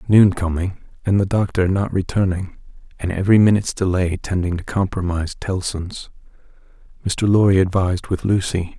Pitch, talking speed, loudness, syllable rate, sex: 95 Hz, 135 wpm, -19 LUFS, 5.4 syllables/s, male